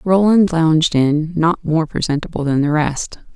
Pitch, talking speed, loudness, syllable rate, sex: 160 Hz, 160 wpm, -16 LUFS, 4.5 syllables/s, female